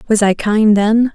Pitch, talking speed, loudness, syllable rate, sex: 215 Hz, 210 wpm, -13 LUFS, 4.1 syllables/s, female